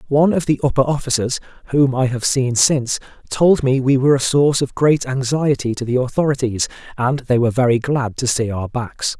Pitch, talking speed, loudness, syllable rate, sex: 130 Hz, 200 wpm, -17 LUFS, 5.6 syllables/s, male